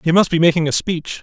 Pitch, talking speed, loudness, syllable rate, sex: 165 Hz, 295 wpm, -16 LUFS, 6.2 syllables/s, male